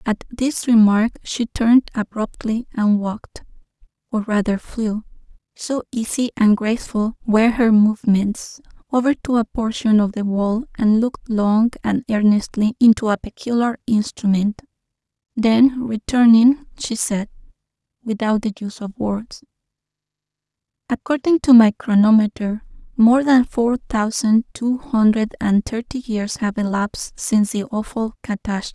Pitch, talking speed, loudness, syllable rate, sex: 225 Hz, 125 wpm, -18 LUFS, 4.4 syllables/s, female